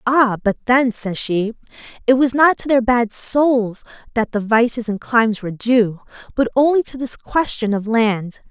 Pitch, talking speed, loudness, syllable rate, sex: 235 Hz, 185 wpm, -18 LUFS, 4.4 syllables/s, female